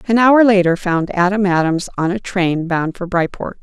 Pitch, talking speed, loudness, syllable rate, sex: 185 Hz, 200 wpm, -16 LUFS, 4.8 syllables/s, female